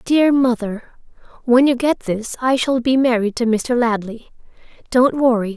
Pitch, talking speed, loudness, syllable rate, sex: 245 Hz, 160 wpm, -17 LUFS, 4.4 syllables/s, female